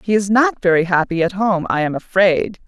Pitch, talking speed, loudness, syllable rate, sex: 190 Hz, 225 wpm, -16 LUFS, 5.2 syllables/s, female